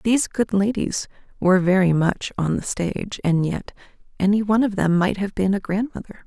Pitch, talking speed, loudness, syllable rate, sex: 195 Hz, 200 wpm, -21 LUFS, 5.7 syllables/s, female